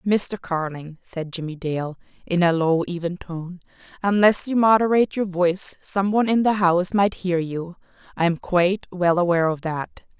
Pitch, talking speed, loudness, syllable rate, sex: 180 Hz, 170 wpm, -21 LUFS, 5.0 syllables/s, female